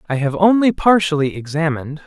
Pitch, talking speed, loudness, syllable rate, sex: 165 Hz, 145 wpm, -16 LUFS, 5.9 syllables/s, male